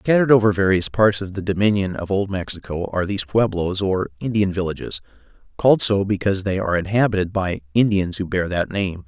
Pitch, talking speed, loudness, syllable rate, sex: 100 Hz, 185 wpm, -20 LUFS, 6.1 syllables/s, male